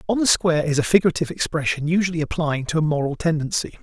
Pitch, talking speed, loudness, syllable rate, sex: 160 Hz, 205 wpm, -21 LUFS, 7.1 syllables/s, male